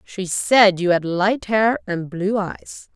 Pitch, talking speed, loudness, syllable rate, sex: 195 Hz, 185 wpm, -19 LUFS, 3.3 syllables/s, female